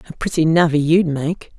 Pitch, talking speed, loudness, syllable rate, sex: 160 Hz, 190 wpm, -17 LUFS, 5.4 syllables/s, female